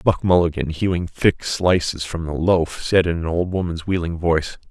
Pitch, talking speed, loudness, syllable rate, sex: 85 Hz, 190 wpm, -20 LUFS, 4.9 syllables/s, male